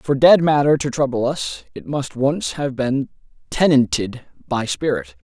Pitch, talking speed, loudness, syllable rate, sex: 130 Hz, 160 wpm, -19 LUFS, 4.3 syllables/s, male